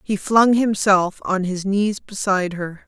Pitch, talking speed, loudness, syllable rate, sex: 195 Hz, 165 wpm, -19 LUFS, 4.0 syllables/s, female